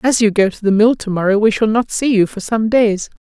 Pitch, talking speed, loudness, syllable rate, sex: 215 Hz, 280 wpm, -15 LUFS, 5.6 syllables/s, female